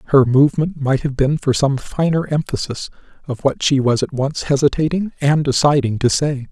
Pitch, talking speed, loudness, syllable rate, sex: 140 Hz, 185 wpm, -17 LUFS, 5.0 syllables/s, male